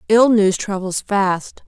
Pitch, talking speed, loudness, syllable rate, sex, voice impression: 200 Hz, 145 wpm, -17 LUFS, 3.4 syllables/s, female, feminine, slightly gender-neutral, adult-like, slightly middle-aged, slightly thin, slightly tensed, powerful, slightly dark, hard, clear, fluent, cool, intellectual, slightly refreshing, very sincere, calm, slightly friendly, slightly reassuring, very unique, slightly elegant, wild, lively, very strict, slightly intense, sharp, slightly light